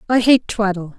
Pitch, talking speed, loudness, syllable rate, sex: 215 Hz, 180 wpm, -16 LUFS, 5.2 syllables/s, female